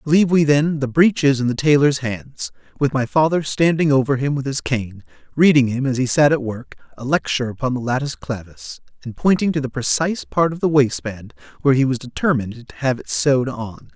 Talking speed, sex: 210 wpm, male